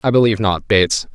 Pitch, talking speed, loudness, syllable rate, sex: 105 Hz, 210 wpm, -16 LUFS, 7.0 syllables/s, male